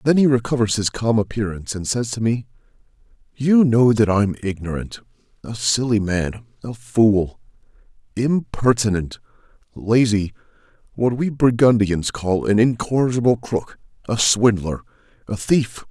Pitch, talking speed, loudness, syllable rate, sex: 110 Hz, 115 wpm, -19 LUFS, 4.5 syllables/s, male